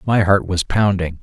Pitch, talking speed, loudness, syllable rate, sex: 95 Hz, 195 wpm, -17 LUFS, 4.6 syllables/s, male